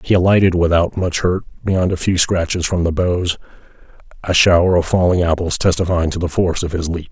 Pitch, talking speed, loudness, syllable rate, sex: 85 Hz, 200 wpm, -16 LUFS, 5.7 syllables/s, male